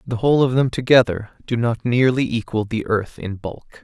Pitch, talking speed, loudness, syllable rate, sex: 120 Hz, 205 wpm, -19 LUFS, 5.3 syllables/s, male